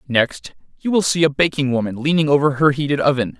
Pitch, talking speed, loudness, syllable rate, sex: 145 Hz, 210 wpm, -18 LUFS, 6.0 syllables/s, male